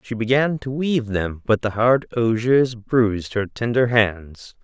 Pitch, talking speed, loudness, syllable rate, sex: 115 Hz, 170 wpm, -20 LUFS, 4.1 syllables/s, male